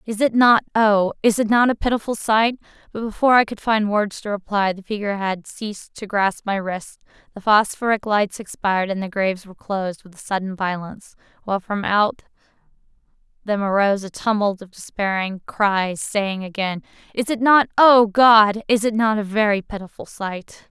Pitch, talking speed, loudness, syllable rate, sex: 205 Hz, 175 wpm, -19 LUFS, 5.2 syllables/s, female